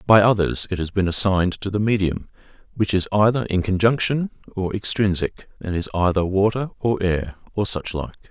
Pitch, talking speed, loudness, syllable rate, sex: 100 Hz, 180 wpm, -21 LUFS, 5.2 syllables/s, male